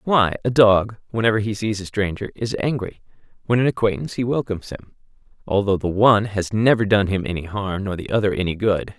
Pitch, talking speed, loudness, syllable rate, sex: 105 Hz, 200 wpm, -20 LUFS, 5.9 syllables/s, male